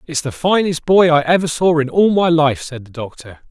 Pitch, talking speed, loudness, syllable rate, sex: 155 Hz, 240 wpm, -15 LUFS, 5.1 syllables/s, male